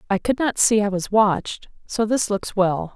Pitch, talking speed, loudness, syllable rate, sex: 210 Hz, 225 wpm, -20 LUFS, 4.6 syllables/s, female